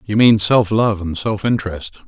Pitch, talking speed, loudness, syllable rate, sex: 100 Hz, 200 wpm, -16 LUFS, 4.9 syllables/s, male